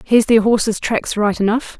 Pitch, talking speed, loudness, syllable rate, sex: 220 Hz, 200 wpm, -16 LUFS, 5.3 syllables/s, female